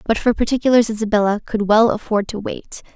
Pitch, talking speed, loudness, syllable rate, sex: 215 Hz, 185 wpm, -18 LUFS, 6.0 syllables/s, female